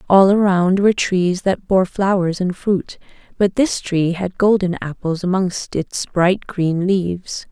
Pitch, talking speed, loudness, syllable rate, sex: 185 Hz, 160 wpm, -18 LUFS, 3.9 syllables/s, female